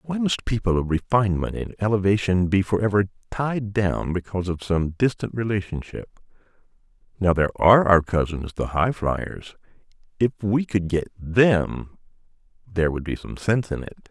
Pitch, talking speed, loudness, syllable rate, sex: 100 Hz, 150 wpm, -23 LUFS, 5.3 syllables/s, male